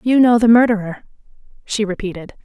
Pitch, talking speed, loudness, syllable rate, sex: 215 Hz, 150 wpm, -15 LUFS, 5.8 syllables/s, female